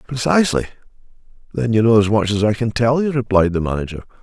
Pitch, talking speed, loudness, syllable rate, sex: 110 Hz, 185 wpm, -17 LUFS, 6.7 syllables/s, male